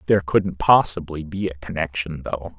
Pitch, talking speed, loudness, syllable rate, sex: 85 Hz, 160 wpm, -21 LUFS, 5.1 syllables/s, male